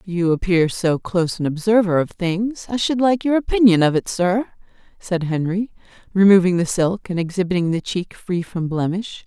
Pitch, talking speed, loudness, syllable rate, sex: 185 Hz, 180 wpm, -19 LUFS, 4.9 syllables/s, female